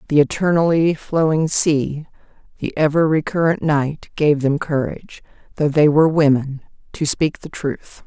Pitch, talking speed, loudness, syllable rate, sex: 150 Hz, 140 wpm, -18 LUFS, 4.5 syllables/s, female